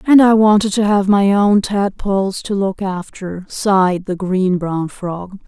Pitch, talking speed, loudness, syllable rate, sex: 195 Hz, 175 wpm, -15 LUFS, 4.0 syllables/s, female